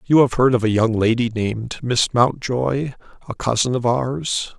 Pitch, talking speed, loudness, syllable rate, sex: 120 Hz, 185 wpm, -19 LUFS, 4.4 syllables/s, male